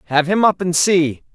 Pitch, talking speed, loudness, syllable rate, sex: 175 Hz, 225 wpm, -16 LUFS, 4.7 syllables/s, female